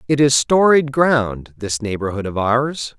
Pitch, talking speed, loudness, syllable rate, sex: 125 Hz, 160 wpm, -17 LUFS, 4.0 syllables/s, male